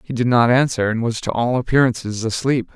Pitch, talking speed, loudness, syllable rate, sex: 120 Hz, 220 wpm, -18 LUFS, 5.7 syllables/s, male